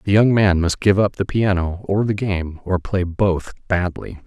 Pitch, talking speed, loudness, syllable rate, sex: 95 Hz, 210 wpm, -19 LUFS, 4.4 syllables/s, male